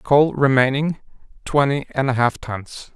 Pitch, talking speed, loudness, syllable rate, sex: 135 Hz, 140 wpm, -19 LUFS, 4.0 syllables/s, male